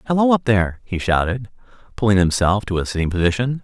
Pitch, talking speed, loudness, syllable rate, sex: 110 Hz, 180 wpm, -19 LUFS, 6.4 syllables/s, male